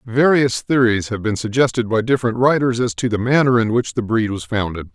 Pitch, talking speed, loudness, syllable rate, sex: 120 Hz, 220 wpm, -18 LUFS, 5.6 syllables/s, male